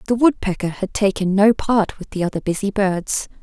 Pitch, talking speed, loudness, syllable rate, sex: 200 Hz, 195 wpm, -19 LUFS, 5.1 syllables/s, female